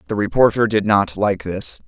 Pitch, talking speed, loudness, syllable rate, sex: 105 Hz, 190 wpm, -18 LUFS, 4.8 syllables/s, male